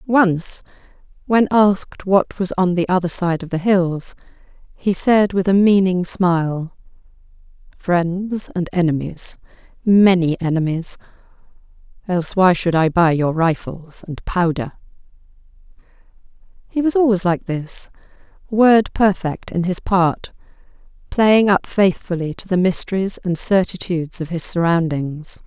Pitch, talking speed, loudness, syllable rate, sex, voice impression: 180 Hz, 120 wpm, -18 LUFS, 4.2 syllables/s, female, feminine, adult-like, slightly relaxed, clear, intellectual, calm, reassuring, elegant, slightly lively, slightly strict